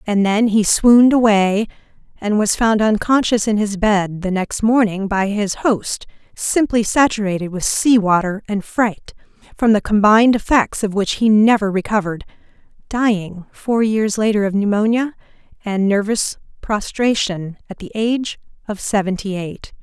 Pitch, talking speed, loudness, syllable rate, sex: 210 Hz, 150 wpm, -17 LUFS, 4.6 syllables/s, female